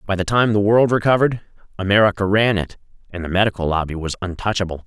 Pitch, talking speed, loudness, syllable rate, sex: 100 Hz, 185 wpm, -18 LUFS, 6.7 syllables/s, male